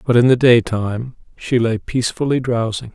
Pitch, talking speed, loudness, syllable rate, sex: 120 Hz, 165 wpm, -17 LUFS, 5.3 syllables/s, male